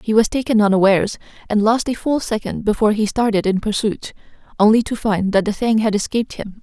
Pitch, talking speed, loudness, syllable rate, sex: 215 Hz, 210 wpm, -18 LUFS, 6.0 syllables/s, female